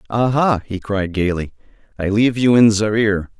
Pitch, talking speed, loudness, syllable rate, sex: 105 Hz, 195 wpm, -17 LUFS, 4.9 syllables/s, male